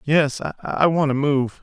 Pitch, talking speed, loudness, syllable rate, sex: 140 Hz, 185 wpm, -20 LUFS, 3.8 syllables/s, male